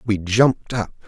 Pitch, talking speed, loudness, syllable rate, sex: 110 Hz, 165 wpm, -19 LUFS, 4.8 syllables/s, male